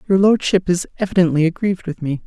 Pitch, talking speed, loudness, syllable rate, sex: 180 Hz, 185 wpm, -18 LUFS, 6.4 syllables/s, male